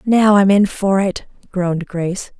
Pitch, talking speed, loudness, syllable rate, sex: 190 Hz, 175 wpm, -16 LUFS, 4.4 syllables/s, female